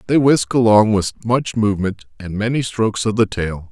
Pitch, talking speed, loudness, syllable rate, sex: 110 Hz, 195 wpm, -17 LUFS, 5.2 syllables/s, male